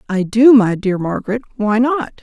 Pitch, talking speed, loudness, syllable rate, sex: 225 Hz, 190 wpm, -15 LUFS, 5.0 syllables/s, female